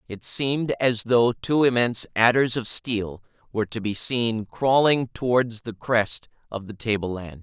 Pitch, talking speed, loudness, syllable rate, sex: 115 Hz, 170 wpm, -23 LUFS, 4.4 syllables/s, male